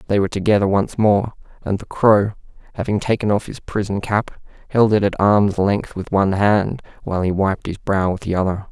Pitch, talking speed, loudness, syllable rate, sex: 100 Hz, 205 wpm, -19 LUFS, 5.4 syllables/s, male